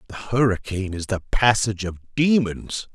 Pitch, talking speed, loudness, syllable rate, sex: 105 Hz, 145 wpm, -22 LUFS, 5.2 syllables/s, male